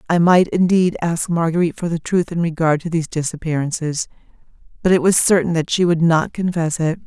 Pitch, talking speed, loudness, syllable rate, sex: 165 Hz, 195 wpm, -18 LUFS, 5.7 syllables/s, female